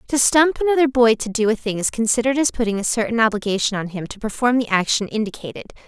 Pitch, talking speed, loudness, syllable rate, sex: 230 Hz, 225 wpm, -19 LUFS, 7.2 syllables/s, female